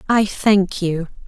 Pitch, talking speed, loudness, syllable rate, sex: 190 Hz, 140 wpm, -18 LUFS, 3.2 syllables/s, female